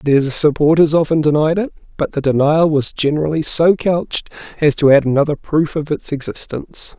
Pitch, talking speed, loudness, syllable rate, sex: 155 Hz, 170 wpm, -16 LUFS, 5.4 syllables/s, male